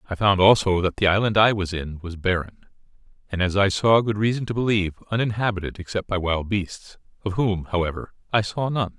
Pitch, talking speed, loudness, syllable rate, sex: 100 Hz, 200 wpm, -22 LUFS, 5.6 syllables/s, male